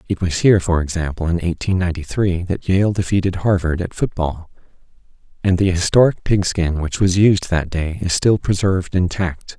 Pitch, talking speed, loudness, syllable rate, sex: 90 Hz, 175 wpm, -18 LUFS, 5.2 syllables/s, male